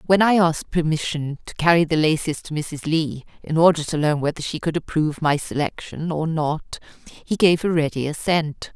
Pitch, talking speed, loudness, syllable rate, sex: 160 Hz, 190 wpm, -21 LUFS, 5.1 syllables/s, female